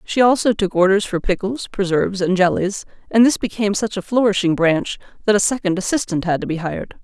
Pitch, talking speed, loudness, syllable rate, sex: 200 Hz, 205 wpm, -18 LUFS, 6.0 syllables/s, female